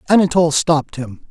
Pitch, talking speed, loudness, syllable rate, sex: 155 Hz, 140 wpm, -15 LUFS, 6.7 syllables/s, male